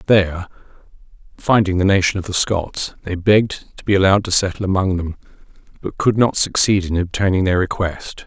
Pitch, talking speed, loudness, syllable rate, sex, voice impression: 95 Hz, 175 wpm, -17 LUFS, 5.6 syllables/s, male, masculine, middle-aged, thick, tensed, slightly dark, clear, intellectual, calm, mature, reassuring, wild, lively, slightly strict